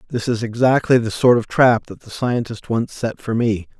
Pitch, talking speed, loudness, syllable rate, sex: 115 Hz, 220 wpm, -18 LUFS, 4.8 syllables/s, male